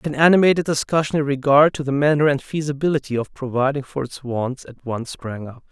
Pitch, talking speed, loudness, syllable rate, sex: 140 Hz, 210 wpm, -20 LUFS, 5.9 syllables/s, male